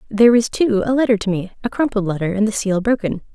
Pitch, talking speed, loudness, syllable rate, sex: 215 Hz, 250 wpm, -18 LUFS, 6.6 syllables/s, female